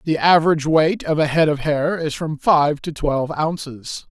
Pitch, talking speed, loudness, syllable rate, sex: 155 Hz, 200 wpm, -18 LUFS, 4.9 syllables/s, male